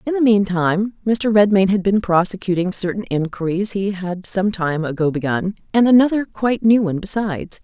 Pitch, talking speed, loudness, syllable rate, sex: 195 Hz, 175 wpm, -18 LUFS, 5.4 syllables/s, female